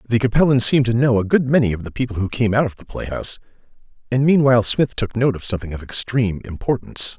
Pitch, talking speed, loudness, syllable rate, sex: 115 Hz, 225 wpm, -19 LUFS, 6.9 syllables/s, male